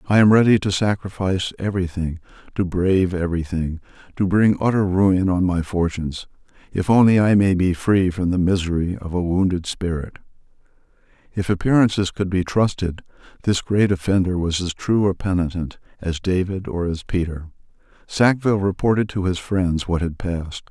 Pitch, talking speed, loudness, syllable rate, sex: 95 Hz, 165 wpm, -20 LUFS, 5.3 syllables/s, male